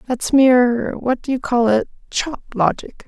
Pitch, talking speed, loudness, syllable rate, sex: 245 Hz, 135 wpm, -18 LUFS, 4.5 syllables/s, female